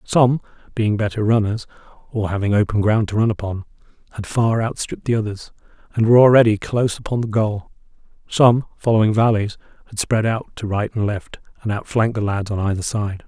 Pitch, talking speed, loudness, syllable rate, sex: 110 Hz, 180 wpm, -19 LUFS, 5.8 syllables/s, male